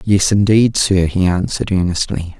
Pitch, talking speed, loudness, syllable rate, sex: 95 Hz, 150 wpm, -15 LUFS, 4.8 syllables/s, male